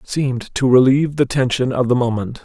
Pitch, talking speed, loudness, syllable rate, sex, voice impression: 130 Hz, 195 wpm, -17 LUFS, 5.6 syllables/s, male, masculine, middle-aged, thick, cool, calm, slightly wild